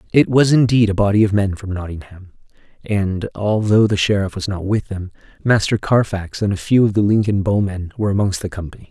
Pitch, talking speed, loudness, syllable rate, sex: 100 Hz, 200 wpm, -17 LUFS, 5.7 syllables/s, male